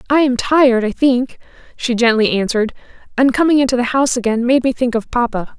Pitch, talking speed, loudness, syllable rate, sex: 245 Hz, 205 wpm, -15 LUFS, 6.1 syllables/s, female